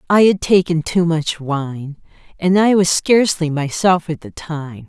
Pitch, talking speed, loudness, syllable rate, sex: 170 Hz, 170 wpm, -16 LUFS, 4.2 syllables/s, female